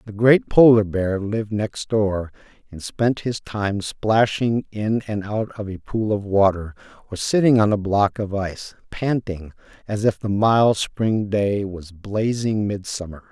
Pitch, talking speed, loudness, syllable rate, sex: 105 Hz, 165 wpm, -21 LUFS, 4.0 syllables/s, male